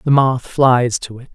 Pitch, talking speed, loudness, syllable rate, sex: 125 Hz, 220 wpm, -15 LUFS, 4.1 syllables/s, male